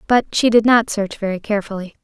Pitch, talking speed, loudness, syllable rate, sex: 215 Hz, 205 wpm, -17 LUFS, 6.2 syllables/s, female